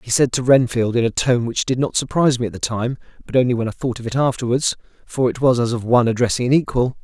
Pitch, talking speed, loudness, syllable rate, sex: 120 Hz, 265 wpm, -19 LUFS, 6.6 syllables/s, male